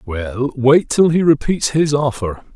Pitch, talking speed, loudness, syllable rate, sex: 135 Hz, 165 wpm, -16 LUFS, 3.9 syllables/s, male